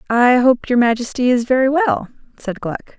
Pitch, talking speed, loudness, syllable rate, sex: 250 Hz, 180 wpm, -16 LUFS, 5.1 syllables/s, female